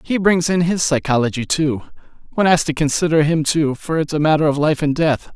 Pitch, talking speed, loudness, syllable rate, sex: 155 Hz, 225 wpm, -17 LUFS, 5.7 syllables/s, male